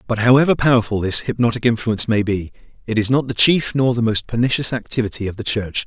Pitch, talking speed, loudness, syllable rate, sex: 115 Hz, 215 wpm, -17 LUFS, 6.3 syllables/s, male